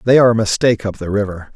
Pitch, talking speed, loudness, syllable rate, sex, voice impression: 105 Hz, 270 wpm, -16 LUFS, 7.7 syllables/s, male, very masculine, very middle-aged, very thick, tensed, powerful, bright, soft, clear, fluent, slightly raspy, cool, very intellectual, refreshing, sincere, very calm, mature, very friendly, reassuring, very unique, elegant, very wild, sweet, lively, slightly kind, slightly intense